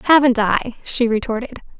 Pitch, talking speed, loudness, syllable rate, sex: 240 Hz, 135 wpm, -18 LUFS, 5.3 syllables/s, female